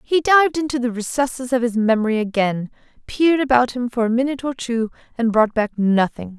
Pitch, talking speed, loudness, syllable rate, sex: 240 Hz, 195 wpm, -19 LUFS, 5.8 syllables/s, female